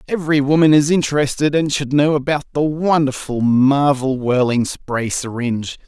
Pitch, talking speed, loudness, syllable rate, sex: 140 Hz, 145 wpm, -17 LUFS, 4.9 syllables/s, male